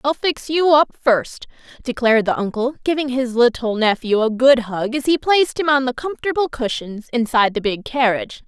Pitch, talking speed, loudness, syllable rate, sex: 255 Hz, 190 wpm, -18 LUFS, 5.4 syllables/s, female